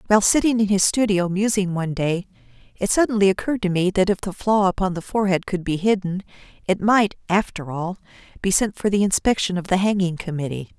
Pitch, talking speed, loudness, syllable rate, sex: 190 Hz, 200 wpm, -21 LUFS, 6.0 syllables/s, female